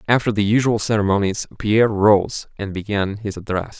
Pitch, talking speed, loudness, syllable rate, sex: 105 Hz, 160 wpm, -19 LUFS, 5.3 syllables/s, male